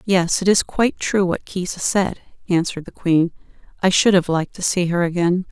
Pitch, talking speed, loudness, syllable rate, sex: 180 Hz, 205 wpm, -19 LUFS, 5.4 syllables/s, female